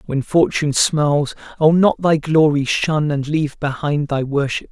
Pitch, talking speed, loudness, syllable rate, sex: 150 Hz, 165 wpm, -17 LUFS, 4.6 syllables/s, male